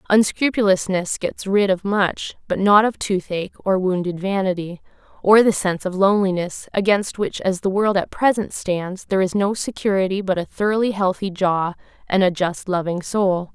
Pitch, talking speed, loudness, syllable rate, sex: 190 Hz, 175 wpm, -20 LUFS, 5.0 syllables/s, female